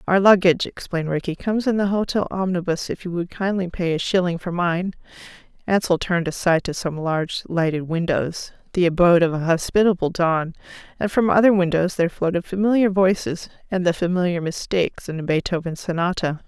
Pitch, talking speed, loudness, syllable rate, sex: 175 Hz, 175 wpm, -21 LUFS, 5.9 syllables/s, female